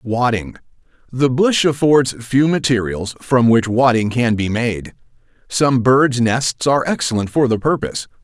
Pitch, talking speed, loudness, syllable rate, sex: 125 Hz, 140 wpm, -16 LUFS, 4.3 syllables/s, male